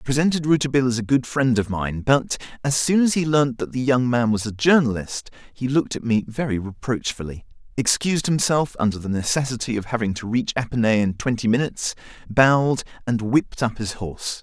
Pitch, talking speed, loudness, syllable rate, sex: 125 Hz, 195 wpm, -21 LUFS, 5.9 syllables/s, male